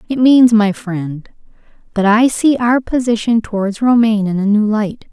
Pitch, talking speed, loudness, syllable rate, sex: 220 Hz, 175 wpm, -14 LUFS, 4.6 syllables/s, female